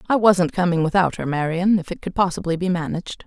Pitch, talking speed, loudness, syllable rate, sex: 175 Hz, 220 wpm, -20 LUFS, 6.0 syllables/s, female